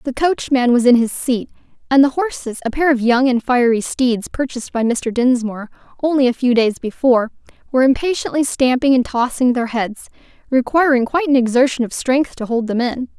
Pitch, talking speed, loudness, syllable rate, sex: 255 Hz, 190 wpm, -16 LUFS, 5.5 syllables/s, female